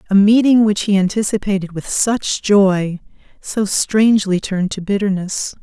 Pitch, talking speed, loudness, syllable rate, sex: 200 Hz, 140 wpm, -16 LUFS, 4.6 syllables/s, female